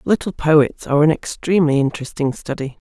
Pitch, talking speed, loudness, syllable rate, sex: 150 Hz, 145 wpm, -18 LUFS, 5.9 syllables/s, female